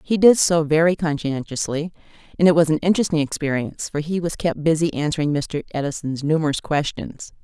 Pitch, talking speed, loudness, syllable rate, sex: 155 Hz, 170 wpm, -20 LUFS, 5.8 syllables/s, female